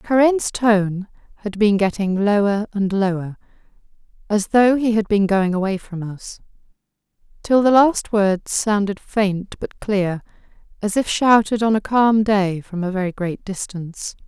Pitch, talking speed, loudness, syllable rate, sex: 205 Hz, 155 wpm, -19 LUFS, 4.2 syllables/s, female